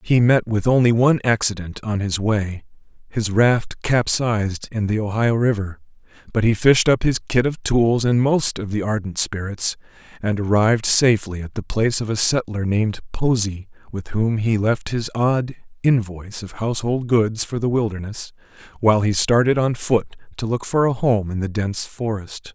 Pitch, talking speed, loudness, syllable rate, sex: 110 Hz, 180 wpm, -20 LUFS, 4.9 syllables/s, male